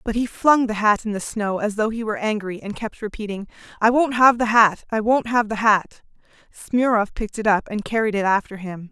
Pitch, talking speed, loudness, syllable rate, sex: 215 Hz, 235 wpm, -20 LUFS, 5.4 syllables/s, female